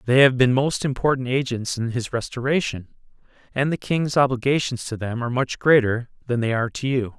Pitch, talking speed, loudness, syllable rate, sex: 125 Hz, 190 wpm, -22 LUFS, 5.6 syllables/s, male